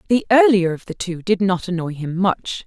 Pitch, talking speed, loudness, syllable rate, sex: 190 Hz, 225 wpm, -19 LUFS, 4.9 syllables/s, female